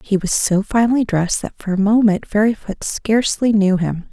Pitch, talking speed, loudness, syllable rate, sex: 205 Hz, 190 wpm, -17 LUFS, 5.4 syllables/s, female